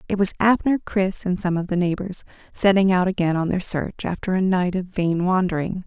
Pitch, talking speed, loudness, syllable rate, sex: 185 Hz, 215 wpm, -21 LUFS, 5.3 syllables/s, female